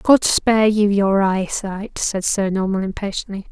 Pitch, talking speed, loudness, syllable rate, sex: 200 Hz, 170 wpm, -18 LUFS, 4.4 syllables/s, female